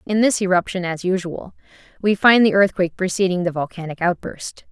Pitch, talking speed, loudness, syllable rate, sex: 185 Hz, 165 wpm, -19 LUFS, 5.6 syllables/s, female